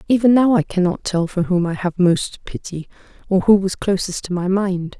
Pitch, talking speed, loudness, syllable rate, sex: 185 Hz, 215 wpm, -18 LUFS, 5.0 syllables/s, female